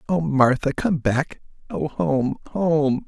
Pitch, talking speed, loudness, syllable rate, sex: 150 Hz, 135 wpm, -21 LUFS, 3.2 syllables/s, male